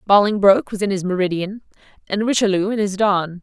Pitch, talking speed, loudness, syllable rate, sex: 200 Hz, 175 wpm, -18 LUFS, 6.0 syllables/s, female